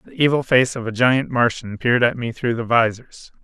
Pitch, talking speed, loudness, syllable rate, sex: 120 Hz, 225 wpm, -19 LUFS, 5.3 syllables/s, male